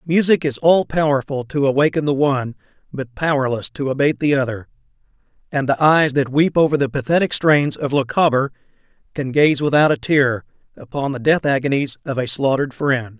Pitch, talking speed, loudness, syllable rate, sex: 140 Hz, 175 wpm, -18 LUFS, 5.5 syllables/s, male